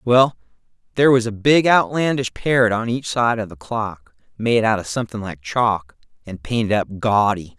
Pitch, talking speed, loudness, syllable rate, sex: 110 Hz, 180 wpm, -19 LUFS, 4.8 syllables/s, male